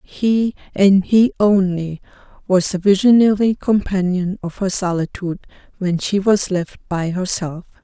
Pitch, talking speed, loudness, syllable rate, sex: 190 Hz, 130 wpm, -17 LUFS, 4.1 syllables/s, female